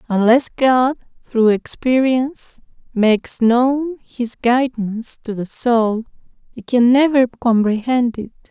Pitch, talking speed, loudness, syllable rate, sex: 240 Hz, 115 wpm, -17 LUFS, 3.7 syllables/s, female